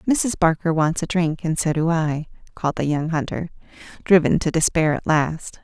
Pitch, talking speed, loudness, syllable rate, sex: 160 Hz, 190 wpm, -21 LUFS, 5.0 syllables/s, female